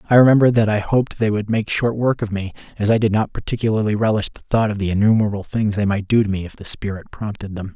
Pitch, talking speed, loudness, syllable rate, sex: 105 Hz, 265 wpm, -19 LUFS, 6.8 syllables/s, male